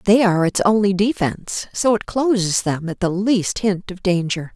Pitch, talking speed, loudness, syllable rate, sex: 195 Hz, 200 wpm, -19 LUFS, 4.8 syllables/s, female